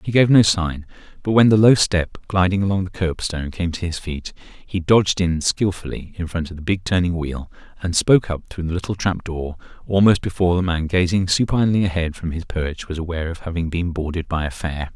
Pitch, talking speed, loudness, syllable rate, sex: 90 Hz, 220 wpm, -20 LUFS, 5.7 syllables/s, male